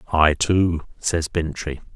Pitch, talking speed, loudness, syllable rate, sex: 80 Hz, 125 wpm, -21 LUFS, 3.4 syllables/s, male